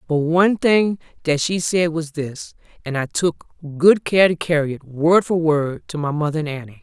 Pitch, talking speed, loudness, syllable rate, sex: 160 Hz, 210 wpm, -19 LUFS, 4.8 syllables/s, female